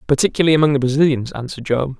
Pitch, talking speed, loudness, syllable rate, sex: 140 Hz, 180 wpm, -17 LUFS, 8.2 syllables/s, male